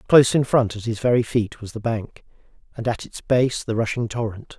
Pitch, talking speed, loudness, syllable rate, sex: 115 Hz, 220 wpm, -22 LUFS, 5.4 syllables/s, male